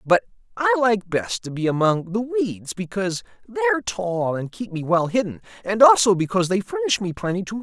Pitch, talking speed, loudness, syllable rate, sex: 195 Hz, 215 wpm, -21 LUFS, 5.6 syllables/s, male